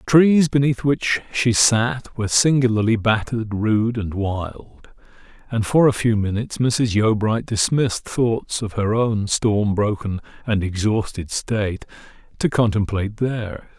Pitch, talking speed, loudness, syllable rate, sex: 110 Hz, 140 wpm, -20 LUFS, 4.3 syllables/s, male